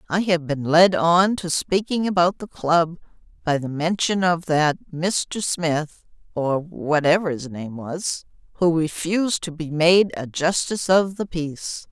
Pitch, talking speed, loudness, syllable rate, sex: 165 Hz, 160 wpm, -21 LUFS, 3.7 syllables/s, female